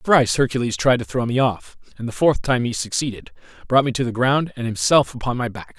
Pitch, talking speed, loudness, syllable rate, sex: 125 Hz, 240 wpm, -20 LUFS, 5.9 syllables/s, male